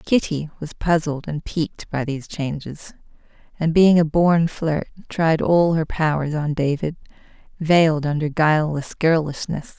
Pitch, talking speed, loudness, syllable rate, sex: 155 Hz, 140 wpm, -20 LUFS, 4.5 syllables/s, female